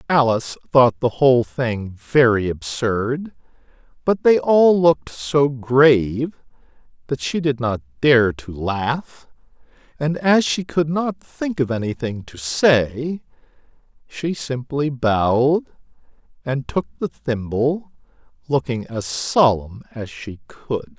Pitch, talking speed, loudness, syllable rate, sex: 130 Hz, 125 wpm, -19 LUFS, 3.6 syllables/s, male